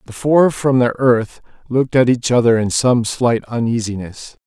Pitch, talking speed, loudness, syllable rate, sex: 120 Hz, 175 wpm, -16 LUFS, 4.6 syllables/s, male